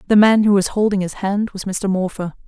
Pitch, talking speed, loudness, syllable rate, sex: 195 Hz, 245 wpm, -17 LUFS, 5.5 syllables/s, female